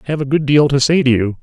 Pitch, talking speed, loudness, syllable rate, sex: 140 Hz, 380 wpm, -14 LUFS, 7.3 syllables/s, male